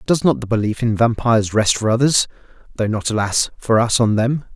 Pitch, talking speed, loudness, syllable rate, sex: 115 Hz, 185 wpm, -17 LUFS, 5.5 syllables/s, male